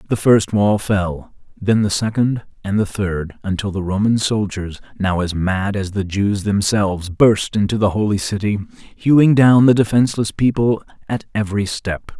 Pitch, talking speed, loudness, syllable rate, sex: 105 Hz, 165 wpm, -17 LUFS, 4.7 syllables/s, male